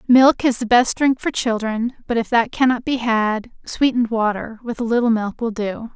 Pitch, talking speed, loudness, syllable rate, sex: 235 Hz, 210 wpm, -19 LUFS, 4.9 syllables/s, female